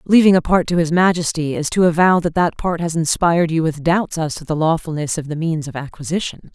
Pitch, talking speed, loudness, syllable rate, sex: 165 Hz, 240 wpm, -18 LUFS, 5.7 syllables/s, female